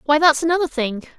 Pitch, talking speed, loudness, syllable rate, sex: 295 Hz, 205 wpm, -18 LUFS, 6.2 syllables/s, female